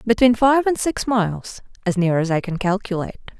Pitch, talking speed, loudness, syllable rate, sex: 210 Hz, 195 wpm, -19 LUFS, 5.6 syllables/s, female